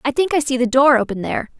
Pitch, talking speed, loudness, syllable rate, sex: 260 Hz, 300 wpm, -17 LUFS, 7.0 syllables/s, female